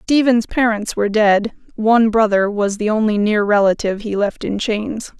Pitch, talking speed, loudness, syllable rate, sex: 215 Hz, 175 wpm, -16 LUFS, 5.0 syllables/s, female